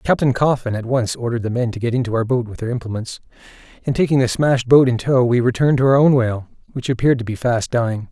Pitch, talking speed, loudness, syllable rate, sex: 125 Hz, 250 wpm, -18 LUFS, 6.9 syllables/s, male